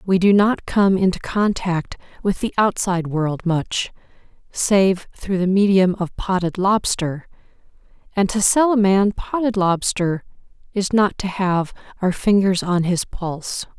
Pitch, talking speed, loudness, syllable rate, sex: 190 Hz, 150 wpm, -19 LUFS, 4.0 syllables/s, female